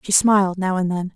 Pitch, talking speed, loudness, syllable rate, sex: 190 Hz, 260 wpm, -19 LUFS, 5.7 syllables/s, female